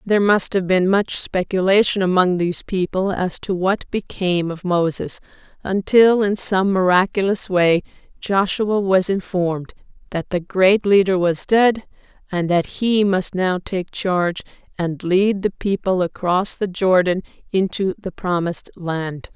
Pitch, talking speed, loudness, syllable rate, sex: 185 Hz, 145 wpm, -19 LUFS, 4.3 syllables/s, female